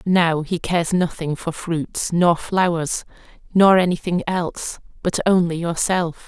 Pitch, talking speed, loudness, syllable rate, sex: 170 Hz, 145 wpm, -20 LUFS, 4.3 syllables/s, female